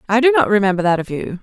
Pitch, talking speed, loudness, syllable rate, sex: 210 Hz, 295 wpm, -16 LUFS, 7.2 syllables/s, female